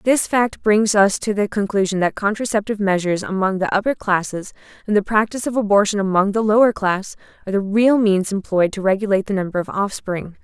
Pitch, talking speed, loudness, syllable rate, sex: 200 Hz, 195 wpm, -18 LUFS, 6.0 syllables/s, female